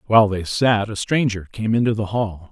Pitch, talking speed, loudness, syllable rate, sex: 105 Hz, 215 wpm, -20 LUFS, 5.2 syllables/s, male